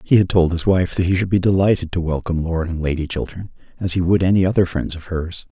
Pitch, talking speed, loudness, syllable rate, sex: 90 Hz, 245 wpm, -19 LUFS, 6.3 syllables/s, male